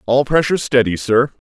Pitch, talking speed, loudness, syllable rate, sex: 125 Hz, 165 wpm, -16 LUFS, 5.8 syllables/s, male